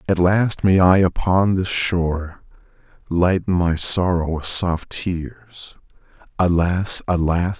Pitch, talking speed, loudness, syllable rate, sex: 90 Hz, 120 wpm, -19 LUFS, 3.4 syllables/s, male